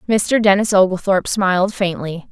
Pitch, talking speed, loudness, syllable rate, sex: 195 Hz, 130 wpm, -16 LUFS, 5.2 syllables/s, female